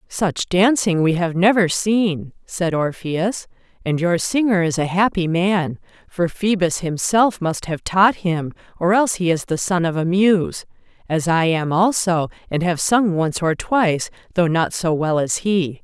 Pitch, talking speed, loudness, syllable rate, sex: 175 Hz, 180 wpm, -19 LUFS, 4.1 syllables/s, female